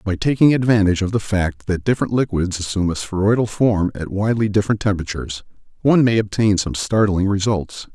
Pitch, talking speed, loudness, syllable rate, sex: 105 Hz, 175 wpm, -18 LUFS, 6.2 syllables/s, male